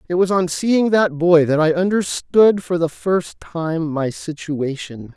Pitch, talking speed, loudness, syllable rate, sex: 170 Hz, 175 wpm, -18 LUFS, 3.8 syllables/s, male